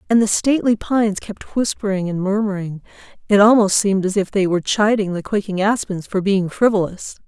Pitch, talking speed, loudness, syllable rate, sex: 200 Hz, 180 wpm, -18 LUFS, 5.7 syllables/s, female